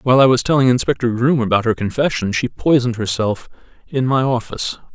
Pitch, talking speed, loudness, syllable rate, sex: 120 Hz, 180 wpm, -17 LUFS, 6.2 syllables/s, male